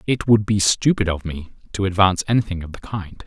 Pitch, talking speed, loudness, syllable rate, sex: 95 Hz, 220 wpm, -20 LUFS, 5.9 syllables/s, male